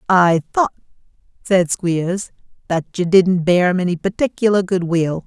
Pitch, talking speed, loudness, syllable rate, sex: 180 Hz, 150 wpm, -17 LUFS, 4.4 syllables/s, female